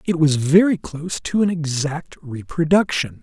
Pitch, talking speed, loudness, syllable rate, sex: 160 Hz, 150 wpm, -19 LUFS, 4.6 syllables/s, male